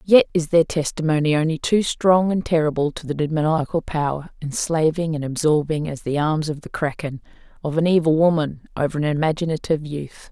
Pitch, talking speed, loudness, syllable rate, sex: 155 Hz, 175 wpm, -21 LUFS, 5.7 syllables/s, female